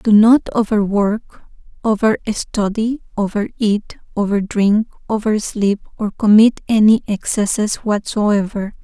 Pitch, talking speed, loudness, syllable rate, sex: 210 Hz, 115 wpm, -16 LUFS, 4.1 syllables/s, female